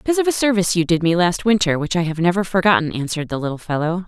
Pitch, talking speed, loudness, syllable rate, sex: 180 Hz, 265 wpm, -18 LUFS, 7.6 syllables/s, female